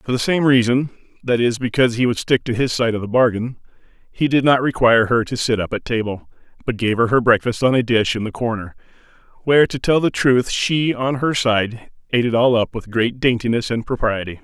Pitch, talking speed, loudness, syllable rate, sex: 120 Hz, 230 wpm, -18 LUFS, 5.7 syllables/s, male